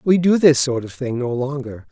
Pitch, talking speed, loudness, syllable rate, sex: 140 Hz, 250 wpm, -18 LUFS, 5.0 syllables/s, male